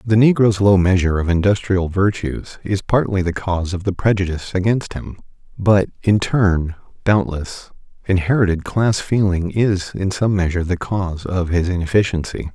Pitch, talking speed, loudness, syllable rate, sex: 95 Hz, 155 wpm, -18 LUFS, 5.0 syllables/s, male